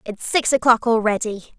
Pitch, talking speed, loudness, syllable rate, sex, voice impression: 230 Hz, 150 wpm, -19 LUFS, 5.5 syllables/s, female, feminine, slightly gender-neutral, very young, very thin, very tensed, slightly weak, very bright, hard, very clear, fluent, slightly raspy, cute, slightly intellectual, very refreshing, slightly sincere, very unique, wild, lively, slightly intense, slightly sharp, slightly light